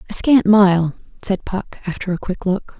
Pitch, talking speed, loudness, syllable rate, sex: 195 Hz, 195 wpm, -17 LUFS, 4.5 syllables/s, female